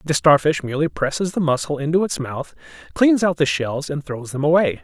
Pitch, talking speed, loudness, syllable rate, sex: 150 Hz, 210 wpm, -20 LUFS, 5.5 syllables/s, male